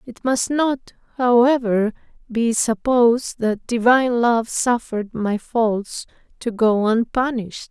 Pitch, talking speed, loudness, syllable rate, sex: 235 Hz, 115 wpm, -19 LUFS, 3.9 syllables/s, female